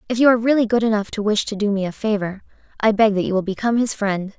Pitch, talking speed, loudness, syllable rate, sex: 210 Hz, 290 wpm, -19 LUFS, 7.1 syllables/s, female